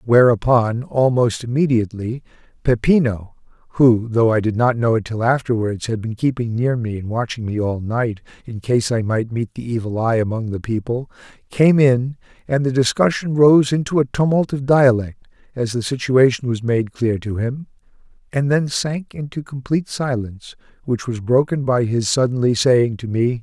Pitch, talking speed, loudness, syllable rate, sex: 125 Hz, 175 wpm, -18 LUFS, 4.9 syllables/s, male